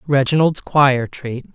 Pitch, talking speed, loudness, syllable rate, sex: 135 Hz, 115 wpm, -16 LUFS, 3.6 syllables/s, male